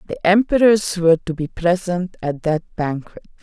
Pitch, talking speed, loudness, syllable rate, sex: 175 Hz, 155 wpm, -18 LUFS, 5.1 syllables/s, female